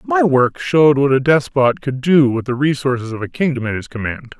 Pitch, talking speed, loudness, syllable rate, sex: 135 Hz, 230 wpm, -16 LUFS, 5.4 syllables/s, male